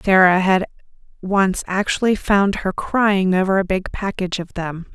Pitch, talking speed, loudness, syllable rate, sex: 190 Hz, 160 wpm, -18 LUFS, 4.5 syllables/s, female